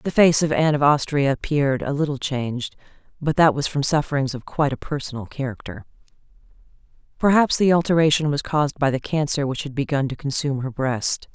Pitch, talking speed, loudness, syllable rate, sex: 140 Hz, 185 wpm, -21 LUFS, 6.0 syllables/s, female